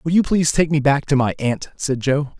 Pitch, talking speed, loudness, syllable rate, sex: 145 Hz, 275 wpm, -19 LUFS, 5.4 syllables/s, male